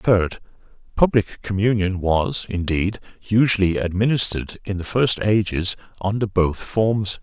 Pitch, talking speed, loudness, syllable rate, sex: 100 Hz, 110 wpm, -21 LUFS, 4.4 syllables/s, male